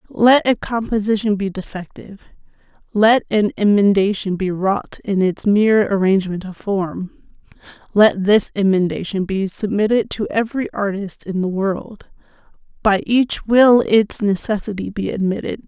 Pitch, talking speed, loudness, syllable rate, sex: 205 Hz, 130 wpm, -18 LUFS, 4.6 syllables/s, female